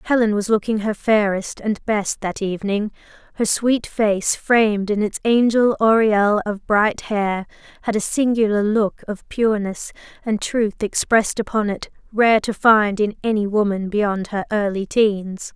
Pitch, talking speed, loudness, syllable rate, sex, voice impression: 210 Hz, 155 wpm, -19 LUFS, 4.4 syllables/s, female, slightly feminine, young, slightly halting, slightly cute, slightly friendly